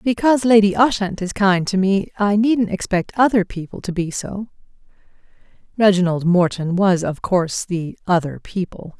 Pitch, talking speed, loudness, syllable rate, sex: 195 Hz, 155 wpm, -18 LUFS, 4.9 syllables/s, female